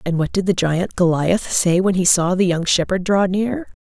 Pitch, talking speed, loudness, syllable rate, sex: 185 Hz, 235 wpm, -18 LUFS, 4.7 syllables/s, female